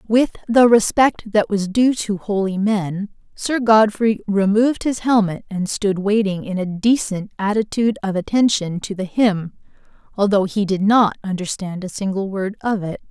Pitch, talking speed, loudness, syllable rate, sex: 205 Hz, 165 wpm, -19 LUFS, 4.6 syllables/s, female